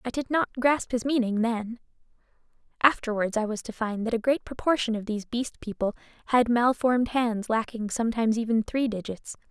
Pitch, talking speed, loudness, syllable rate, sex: 235 Hz, 175 wpm, -26 LUFS, 5.5 syllables/s, female